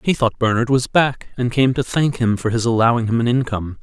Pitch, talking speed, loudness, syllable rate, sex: 120 Hz, 250 wpm, -18 LUFS, 5.8 syllables/s, male